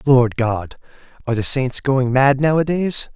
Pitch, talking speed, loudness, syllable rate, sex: 130 Hz, 150 wpm, -17 LUFS, 4.4 syllables/s, male